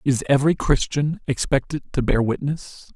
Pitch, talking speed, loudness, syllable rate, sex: 140 Hz, 140 wpm, -22 LUFS, 4.9 syllables/s, male